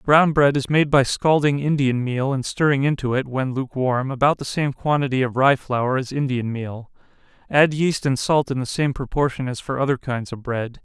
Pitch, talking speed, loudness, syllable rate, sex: 135 Hz, 205 wpm, -21 LUFS, 5.0 syllables/s, male